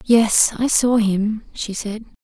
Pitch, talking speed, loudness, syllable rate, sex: 220 Hz, 160 wpm, -18 LUFS, 3.3 syllables/s, female